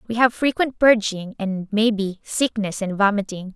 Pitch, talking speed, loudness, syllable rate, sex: 210 Hz, 150 wpm, -21 LUFS, 4.6 syllables/s, female